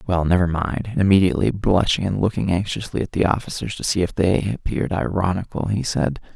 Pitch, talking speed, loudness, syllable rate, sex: 95 Hz, 190 wpm, -21 LUFS, 5.9 syllables/s, male